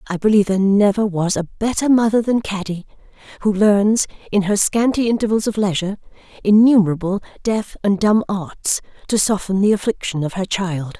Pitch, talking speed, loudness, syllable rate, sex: 200 Hz, 165 wpm, -18 LUFS, 5.5 syllables/s, female